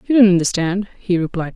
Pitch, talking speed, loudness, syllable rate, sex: 185 Hz, 195 wpm, -17 LUFS, 6.2 syllables/s, female